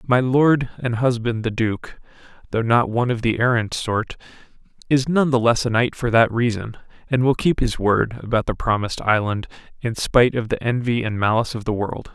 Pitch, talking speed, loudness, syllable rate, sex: 120 Hz, 205 wpm, -20 LUFS, 5.3 syllables/s, male